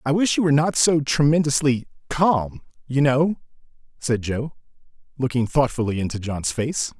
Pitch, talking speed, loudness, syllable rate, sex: 135 Hz, 145 wpm, -21 LUFS, 4.8 syllables/s, male